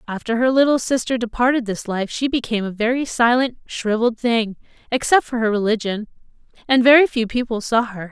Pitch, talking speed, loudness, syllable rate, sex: 235 Hz, 165 wpm, -19 LUFS, 5.7 syllables/s, female